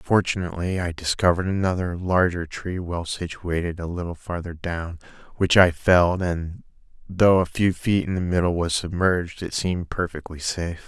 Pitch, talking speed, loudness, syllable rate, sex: 90 Hz, 160 wpm, -23 LUFS, 5.1 syllables/s, male